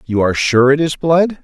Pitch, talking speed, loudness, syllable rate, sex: 145 Hz, 250 wpm, -14 LUFS, 5.3 syllables/s, male